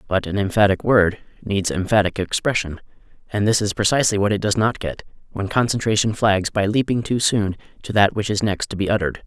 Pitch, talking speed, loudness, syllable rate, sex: 105 Hz, 200 wpm, -20 LUFS, 5.8 syllables/s, male